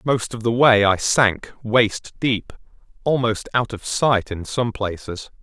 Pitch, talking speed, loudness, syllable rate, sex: 110 Hz, 165 wpm, -20 LUFS, 3.7 syllables/s, male